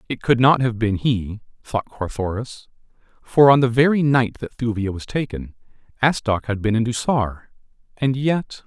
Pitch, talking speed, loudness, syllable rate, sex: 120 Hz, 165 wpm, -20 LUFS, 4.7 syllables/s, male